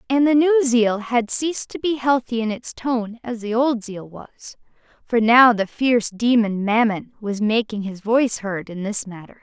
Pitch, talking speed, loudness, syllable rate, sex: 230 Hz, 195 wpm, -20 LUFS, 4.7 syllables/s, female